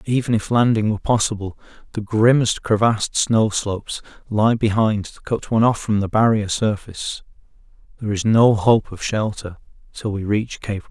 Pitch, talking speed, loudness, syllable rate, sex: 105 Hz, 170 wpm, -19 LUFS, 5.2 syllables/s, male